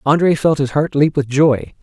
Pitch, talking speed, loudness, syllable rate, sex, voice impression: 145 Hz, 230 wpm, -15 LUFS, 4.8 syllables/s, male, masculine, adult-like, slightly fluent, slightly refreshing, sincere, slightly kind